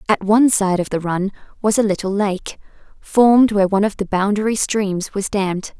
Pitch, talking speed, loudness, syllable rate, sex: 205 Hz, 195 wpm, -17 LUFS, 5.5 syllables/s, female